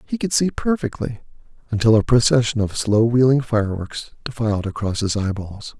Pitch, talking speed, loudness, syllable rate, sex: 115 Hz, 155 wpm, -20 LUFS, 5.4 syllables/s, male